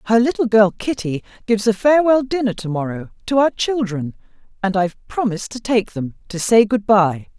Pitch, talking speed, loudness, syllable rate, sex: 215 Hz, 185 wpm, -18 LUFS, 5.5 syllables/s, female